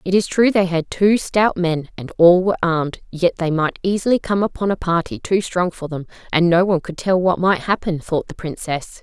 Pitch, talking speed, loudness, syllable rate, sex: 180 Hz, 235 wpm, -18 LUFS, 5.3 syllables/s, female